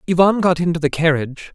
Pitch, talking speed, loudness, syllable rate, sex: 165 Hz, 195 wpm, -17 LUFS, 6.8 syllables/s, male